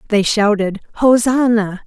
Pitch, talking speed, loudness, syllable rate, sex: 215 Hz, 95 wpm, -15 LUFS, 4.4 syllables/s, female